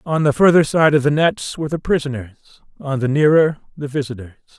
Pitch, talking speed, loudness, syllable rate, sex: 145 Hz, 195 wpm, -17 LUFS, 5.6 syllables/s, male